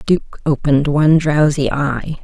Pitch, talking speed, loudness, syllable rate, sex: 145 Hz, 135 wpm, -15 LUFS, 4.5 syllables/s, female